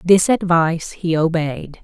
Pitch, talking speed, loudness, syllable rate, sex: 170 Hz, 130 wpm, -17 LUFS, 4.4 syllables/s, female